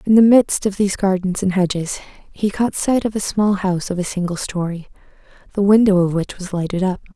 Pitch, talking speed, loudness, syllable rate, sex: 190 Hz, 220 wpm, -18 LUFS, 5.7 syllables/s, female